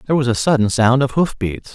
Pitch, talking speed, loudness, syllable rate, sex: 125 Hz, 275 wpm, -17 LUFS, 6.3 syllables/s, male